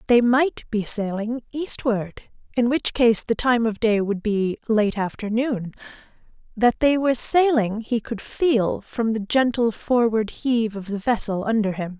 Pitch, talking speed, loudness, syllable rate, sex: 225 Hz, 165 wpm, -22 LUFS, 4.3 syllables/s, female